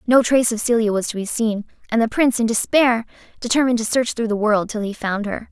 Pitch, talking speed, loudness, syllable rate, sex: 230 Hz, 250 wpm, -19 LUFS, 6.3 syllables/s, female